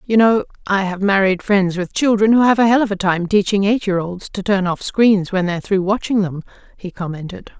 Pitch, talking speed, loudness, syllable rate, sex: 195 Hz, 235 wpm, -17 LUFS, 5.4 syllables/s, female